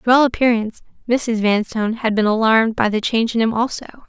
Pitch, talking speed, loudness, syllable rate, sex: 225 Hz, 205 wpm, -18 LUFS, 6.5 syllables/s, female